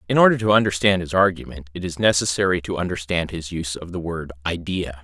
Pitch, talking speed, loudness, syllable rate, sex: 90 Hz, 205 wpm, -21 LUFS, 6.2 syllables/s, male